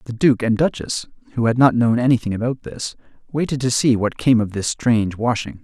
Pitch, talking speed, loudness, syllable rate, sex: 120 Hz, 215 wpm, -19 LUFS, 5.6 syllables/s, male